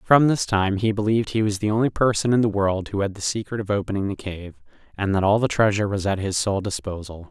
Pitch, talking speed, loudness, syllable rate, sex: 100 Hz, 255 wpm, -22 LUFS, 6.2 syllables/s, male